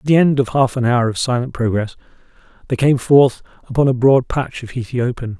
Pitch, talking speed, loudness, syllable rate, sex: 125 Hz, 220 wpm, -17 LUFS, 5.7 syllables/s, male